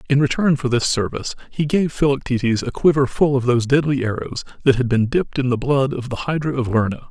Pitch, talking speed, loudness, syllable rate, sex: 130 Hz, 230 wpm, -19 LUFS, 6.2 syllables/s, male